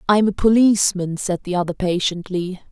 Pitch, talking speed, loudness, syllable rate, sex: 190 Hz, 155 wpm, -19 LUFS, 5.4 syllables/s, female